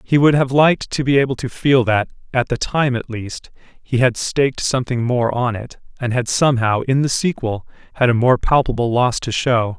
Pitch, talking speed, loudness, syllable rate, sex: 125 Hz, 215 wpm, -17 LUFS, 5.2 syllables/s, male